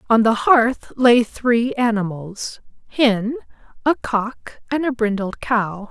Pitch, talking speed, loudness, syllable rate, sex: 230 Hz, 130 wpm, -19 LUFS, 3.6 syllables/s, female